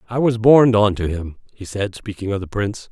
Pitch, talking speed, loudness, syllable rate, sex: 105 Hz, 245 wpm, -18 LUFS, 5.9 syllables/s, male